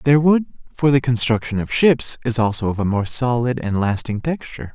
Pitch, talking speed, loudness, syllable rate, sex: 120 Hz, 200 wpm, -19 LUFS, 5.3 syllables/s, male